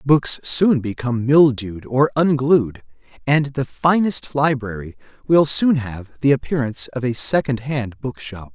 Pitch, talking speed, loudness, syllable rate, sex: 130 Hz, 135 wpm, -18 LUFS, 4.3 syllables/s, male